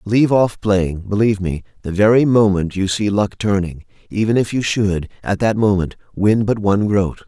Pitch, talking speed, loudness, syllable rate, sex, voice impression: 100 Hz, 190 wpm, -17 LUFS, 5.1 syllables/s, male, very masculine, adult-like, slightly thick, cool, slightly sincere, calm